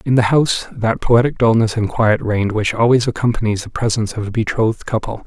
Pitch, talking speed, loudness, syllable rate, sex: 115 Hz, 205 wpm, -17 LUFS, 6.1 syllables/s, male